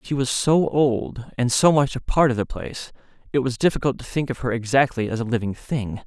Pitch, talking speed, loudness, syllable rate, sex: 130 Hz, 240 wpm, -22 LUFS, 5.5 syllables/s, male